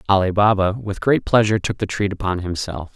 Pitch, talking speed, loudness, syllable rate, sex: 100 Hz, 205 wpm, -19 LUFS, 5.9 syllables/s, male